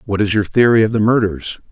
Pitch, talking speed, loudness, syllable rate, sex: 105 Hz, 245 wpm, -15 LUFS, 6.0 syllables/s, male